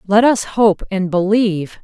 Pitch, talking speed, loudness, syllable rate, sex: 200 Hz, 165 wpm, -15 LUFS, 4.3 syllables/s, female